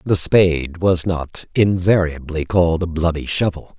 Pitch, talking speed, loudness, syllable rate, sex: 85 Hz, 145 wpm, -18 LUFS, 4.5 syllables/s, male